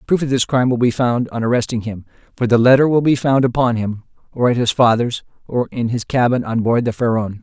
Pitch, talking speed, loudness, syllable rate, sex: 120 Hz, 240 wpm, -17 LUFS, 5.9 syllables/s, male